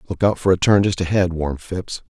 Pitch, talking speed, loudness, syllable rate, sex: 90 Hz, 250 wpm, -19 LUFS, 5.9 syllables/s, male